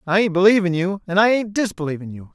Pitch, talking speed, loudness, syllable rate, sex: 185 Hz, 230 wpm, -18 LUFS, 6.5 syllables/s, male